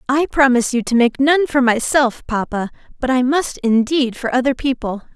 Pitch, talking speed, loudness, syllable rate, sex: 255 Hz, 185 wpm, -17 LUFS, 5.1 syllables/s, female